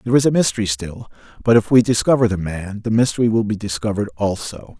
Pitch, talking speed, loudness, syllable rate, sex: 110 Hz, 215 wpm, -18 LUFS, 6.6 syllables/s, male